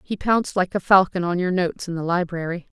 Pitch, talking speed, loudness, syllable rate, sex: 180 Hz, 235 wpm, -21 LUFS, 6.2 syllables/s, female